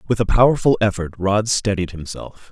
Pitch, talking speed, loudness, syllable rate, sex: 105 Hz, 165 wpm, -18 LUFS, 5.2 syllables/s, male